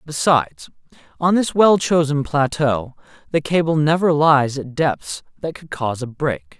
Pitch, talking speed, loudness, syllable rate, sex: 145 Hz, 155 wpm, -18 LUFS, 4.4 syllables/s, male